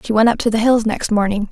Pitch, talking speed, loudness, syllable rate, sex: 220 Hz, 315 wpm, -16 LUFS, 6.4 syllables/s, female